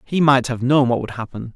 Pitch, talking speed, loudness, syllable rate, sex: 125 Hz, 270 wpm, -18 LUFS, 5.5 syllables/s, male